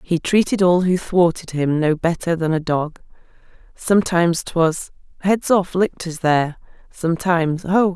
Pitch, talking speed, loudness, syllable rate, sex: 170 Hz, 145 wpm, -19 LUFS, 4.6 syllables/s, female